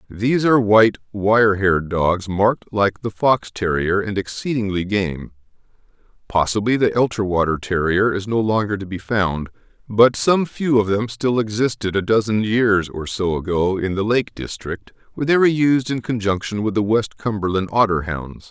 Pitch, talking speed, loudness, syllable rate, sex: 105 Hz, 170 wpm, -19 LUFS, 4.9 syllables/s, male